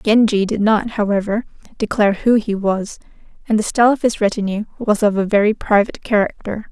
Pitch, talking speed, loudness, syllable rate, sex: 210 Hz, 180 wpm, -17 LUFS, 5.8 syllables/s, female